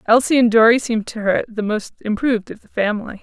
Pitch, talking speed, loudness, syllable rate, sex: 225 Hz, 225 wpm, -18 LUFS, 6.3 syllables/s, female